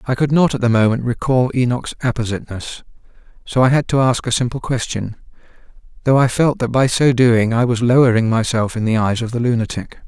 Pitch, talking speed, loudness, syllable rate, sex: 120 Hz, 205 wpm, -17 LUFS, 5.8 syllables/s, male